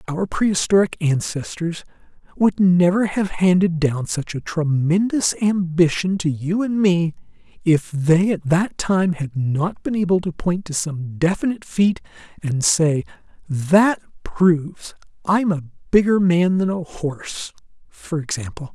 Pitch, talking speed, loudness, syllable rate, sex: 175 Hz, 140 wpm, -20 LUFS, 4.1 syllables/s, male